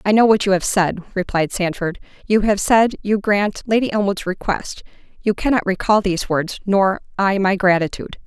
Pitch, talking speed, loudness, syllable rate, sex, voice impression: 195 Hz, 175 wpm, -18 LUFS, 5.2 syllables/s, female, feminine, adult-like, fluent, slightly cool, intellectual